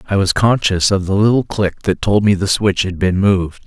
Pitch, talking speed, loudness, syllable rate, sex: 100 Hz, 245 wpm, -15 LUFS, 5.2 syllables/s, male